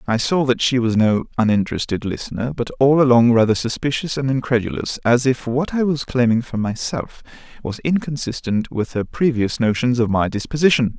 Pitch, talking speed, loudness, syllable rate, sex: 125 Hz, 175 wpm, -19 LUFS, 5.4 syllables/s, male